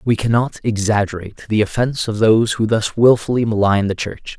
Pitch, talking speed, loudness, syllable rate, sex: 110 Hz, 180 wpm, -17 LUFS, 5.7 syllables/s, male